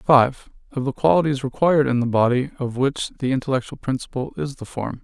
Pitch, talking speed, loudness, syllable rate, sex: 135 Hz, 190 wpm, -21 LUFS, 6.3 syllables/s, male